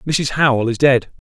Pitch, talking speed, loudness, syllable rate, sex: 130 Hz, 185 wpm, -16 LUFS, 4.6 syllables/s, male